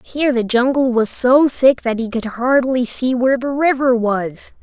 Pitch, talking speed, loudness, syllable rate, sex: 250 Hz, 195 wpm, -16 LUFS, 4.5 syllables/s, female